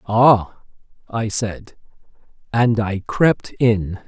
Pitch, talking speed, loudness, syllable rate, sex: 110 Hz, 105 wpm, -19 LUFS, 2.7 syllables/s, male